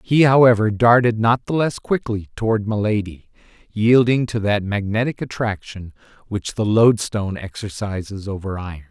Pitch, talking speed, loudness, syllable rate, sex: 110 Hz, 135 wpm, -19 LUFS, 4.9 syllables/s, male